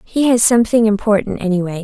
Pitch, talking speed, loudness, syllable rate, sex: 215 Hz, 165 wpm, -14 LUFS, 6.4 syllables/s, female